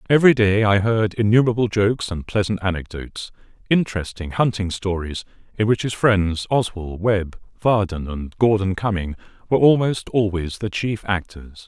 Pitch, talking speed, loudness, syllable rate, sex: 100 Hz, 145 wpm, -20 LUFS, 5.1 syllables/s, male